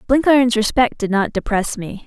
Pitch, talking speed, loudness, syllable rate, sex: 230 Hz, 175 wpm, -17 LUFS, 5.2 syllables/s, female